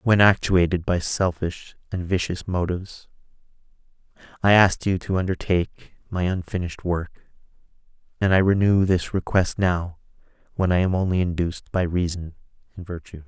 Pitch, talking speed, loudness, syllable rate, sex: 90 Hz, 135 wpm, -23 LUFS, 5.2 syllables/s, male